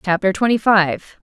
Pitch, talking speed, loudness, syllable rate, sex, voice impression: 195 Hz, 140 wpm, -16 LUFS, 4.6 syllables/s, female, feminine, adult-like, fluent, slightly intellectual, slightly unique